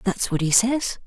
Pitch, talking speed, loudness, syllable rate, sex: 205 Hz, 225 wpm, -21 LUFS, 4.4 syllables/s, female